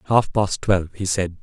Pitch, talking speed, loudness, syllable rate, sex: 95 Hz, 210 wpm, -21 LUFS, 5.2 syllables/s, male